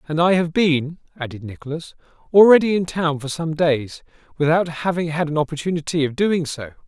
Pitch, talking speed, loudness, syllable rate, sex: 160 Hz, 175 wpm, -19 LUFS, 5.5 syllables/s, male